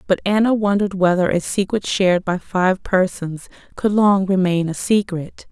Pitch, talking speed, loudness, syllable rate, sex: 190 Hz, 165 wpm, -18 LUFS, 4.7 syllables/s, female